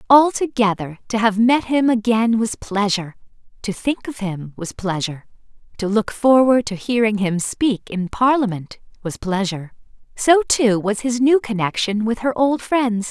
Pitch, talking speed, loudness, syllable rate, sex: 220 Hz, 160 wpm, -19 LUFS, 4.6 syllables/s, female